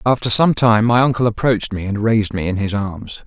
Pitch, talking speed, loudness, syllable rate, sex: 110 Hz, 240 wpm, -17 LUFS, 5.8 syllables/s, male